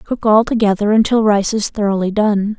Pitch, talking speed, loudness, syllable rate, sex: 210 Hz, 185 wpm, -15 LUFS, 5.2 syllables/s, female